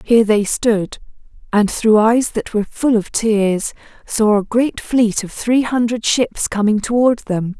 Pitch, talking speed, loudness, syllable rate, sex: 220 Hz, 175 wpm, -16 LUFS, 4.1 syllables/s, female